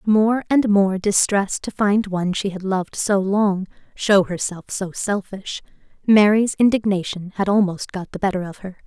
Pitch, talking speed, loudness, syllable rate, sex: 200 Hz, 170 wpm, -20 LUFS, 4.8 syllables/s, female